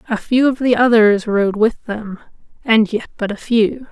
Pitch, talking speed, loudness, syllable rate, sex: 225 Hz, 200 wpm, -16 LUFS, 4.4 syllables/s, female